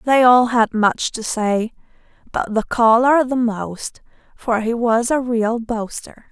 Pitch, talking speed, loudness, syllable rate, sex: 230 Hz, 160 wpm, -18 LUFS, 3.6 syllables/s, female